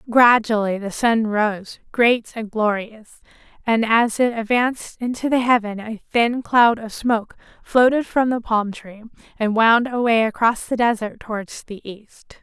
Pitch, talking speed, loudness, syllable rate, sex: 225 Hz, 160 wpm, -19 LUFS, 4.3 syllables/s, female